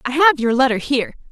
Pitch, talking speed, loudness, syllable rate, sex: 265 Hz, 230 wpm, -17 LUFS, 6.8 syllables/s, female